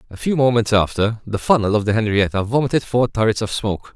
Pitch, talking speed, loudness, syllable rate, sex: 110 Hz, 210 wpm, -18 LUFS, 6.2 syllables/s, male